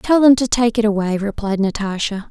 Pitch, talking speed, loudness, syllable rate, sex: 215 Hz, 210 wpm, -17 LUFS, 5.3 syllables/s, female